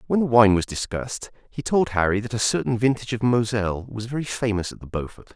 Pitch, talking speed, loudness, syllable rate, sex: 115 Hz, 225 wpm, -23 LUFS, 6.3 syllables/s, male